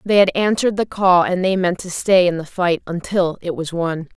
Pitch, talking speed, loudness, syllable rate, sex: 180 Hz, 245 wpm, -18 LUFS, 5.1 syllables/s, female